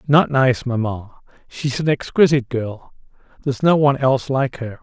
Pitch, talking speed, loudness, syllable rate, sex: 130 Hz, 160 wpm, -18 LUFS, 5.4 syllables/s, male